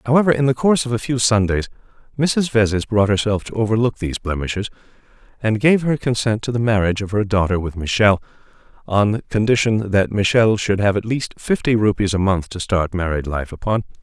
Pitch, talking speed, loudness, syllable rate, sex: 105 Hz, 195 wpm, -18 LUFS, 5.9 syllables/s, male